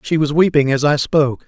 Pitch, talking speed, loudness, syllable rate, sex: 145 Hz, 245 wpm, -15 LUFS, 5.8 syllables/s, male